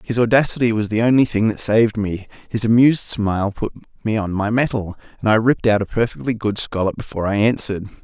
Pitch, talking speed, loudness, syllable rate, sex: 110 Hz, 210 wpm, -19 LUFS, 6.4 syllables/s, male